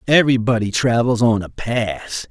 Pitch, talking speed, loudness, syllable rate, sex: 115 Hz, 130 wpm, -18 LUFS, 4.7 syllables/s, male